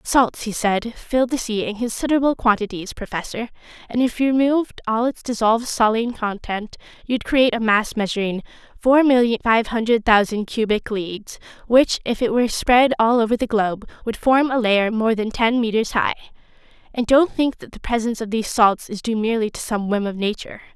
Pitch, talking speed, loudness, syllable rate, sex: 225 Hz, 190 wpm, -20 LUFS, 5.6 syllables/s, female